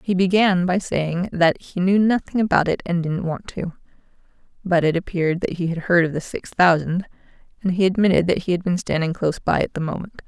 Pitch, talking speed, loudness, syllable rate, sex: 180 Hz, 220 wpm, -20 LUFS, 5.6 syllables/s, female